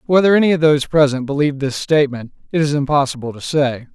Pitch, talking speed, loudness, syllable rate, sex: 145 Hz, 200 wpm, -16 LUFS, 6.7 syllables/s, male